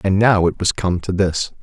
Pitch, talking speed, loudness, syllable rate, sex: 95 Hz, 260 wpm, -18 LUFS, 4.8 syllables/s, male